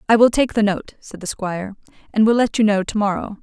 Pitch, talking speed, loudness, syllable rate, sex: 210 Hz, 265 wpm, -19 LUFS, 6.0 syllables/s, female